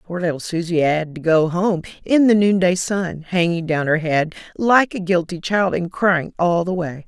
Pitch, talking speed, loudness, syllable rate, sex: 175 Hz, 205 wpm, -19 LUFS, 4.5 syllables/s, female